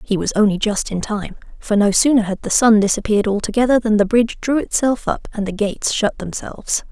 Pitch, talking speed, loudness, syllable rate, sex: 215 Hz, 215 wpm, -17 LUFS, 5.9 syllables/s, female